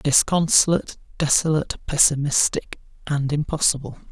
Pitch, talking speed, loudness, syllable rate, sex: 150 Hz, 75 wpm, -20 LUFS, 5.1 syllables/s, male